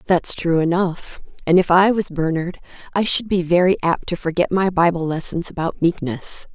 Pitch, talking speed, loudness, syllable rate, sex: 175 Hz, 185 wpm, -19 LUFS, 4.9 syllables/s, female